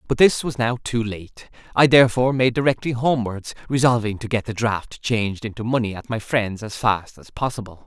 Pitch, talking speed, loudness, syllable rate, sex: 115 Hz, 200 wpm, -21 LUFS, 5.5 syllables/s, male